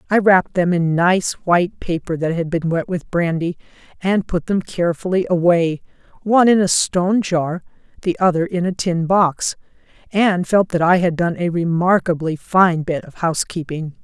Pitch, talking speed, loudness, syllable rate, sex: 175 Hz, 165 wpm, -18 LUFS, 4.9 syllables/s, female